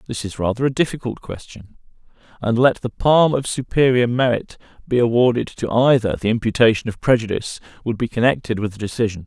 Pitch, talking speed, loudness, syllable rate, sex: 120 Hz, 175 wpm, -19 LUFS, 5.9 syllables/s, male